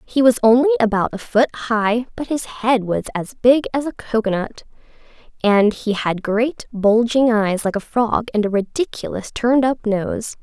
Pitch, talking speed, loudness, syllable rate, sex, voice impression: 230 Hz, 180 wpm, -18 LUFS, 4.4 syllables/s, female, feminine, slightly young, tensed, powerful, bright, soft, clear, fluent, slightly cute, intellectual, friendly, reassuring, elegant, kind